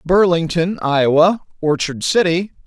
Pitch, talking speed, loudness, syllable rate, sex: 165 Hz, 90 wpm, -16 LUFS, 4.5 syllables/s, male